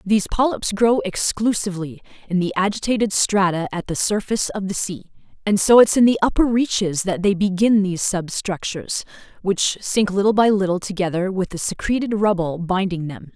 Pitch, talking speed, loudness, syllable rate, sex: 195 Hz, 170 wpm, -20 LUFS, 5.4 syllables/s, female